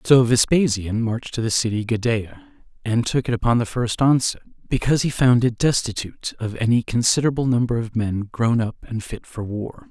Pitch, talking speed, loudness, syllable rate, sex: 120 Hz, 190 wpm, -21 LUFS, 5.7 syllables/s, male